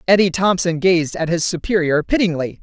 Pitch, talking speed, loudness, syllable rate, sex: 175 Hz, 160 wpm, -17 LUFS, 5.3 syllables/s, female